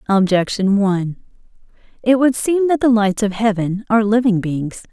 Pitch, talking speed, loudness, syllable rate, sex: 210 Hz, 160 wpm, -17 LUFS, 5.0 syllables/s, female